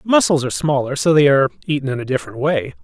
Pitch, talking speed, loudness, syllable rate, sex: 135 Hz, 235 wpm, -17 LUFS, 7.2 syllables/s, male